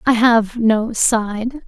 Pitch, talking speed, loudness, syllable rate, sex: 230 Hz, 145 wpm, -16 LUFS, 2.7 syllables/s, female